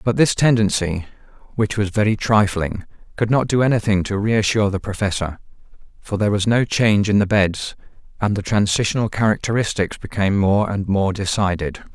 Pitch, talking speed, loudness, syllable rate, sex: 105 Hz, 160 wpm, -19 LUFS, 5.6 syllables/s, male